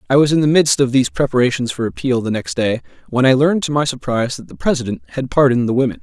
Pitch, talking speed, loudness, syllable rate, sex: 135 Hz, 260 wpm, -17 LUFS, 7.0 syllables/s, male